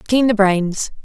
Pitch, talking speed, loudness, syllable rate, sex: 210 Hz, 175 wpm, -16 LUFS, 3.3 syllables/s, female